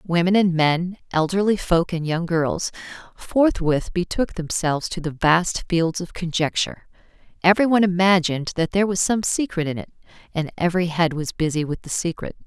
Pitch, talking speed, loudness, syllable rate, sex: 175 Hz, 165 wpm, -21 LUFS, 5.2 syllables/s, female